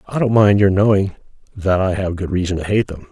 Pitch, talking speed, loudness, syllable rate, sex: 100 Hz, 250 wpm, -17 LUFS, 5.8 syllables/s, male